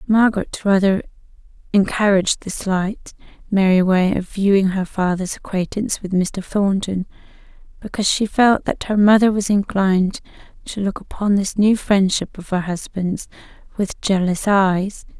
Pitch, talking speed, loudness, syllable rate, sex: 195 Hz, 140 wpm, -18 LUFS, 4.7 syllables/s, female